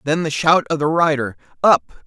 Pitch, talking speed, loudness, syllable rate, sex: 150 Hz, 205 wpm, -17 LUFS, 4.8 syllables/s, male